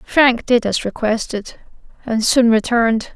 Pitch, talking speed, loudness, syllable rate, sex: 230 Hz, 135 wpm, -16 LUFS, 4.1 syllables/s, female